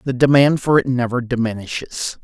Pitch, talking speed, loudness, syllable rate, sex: 125 Hz, 160 wpm, -17 LUFS, 5.2 syllables/s, male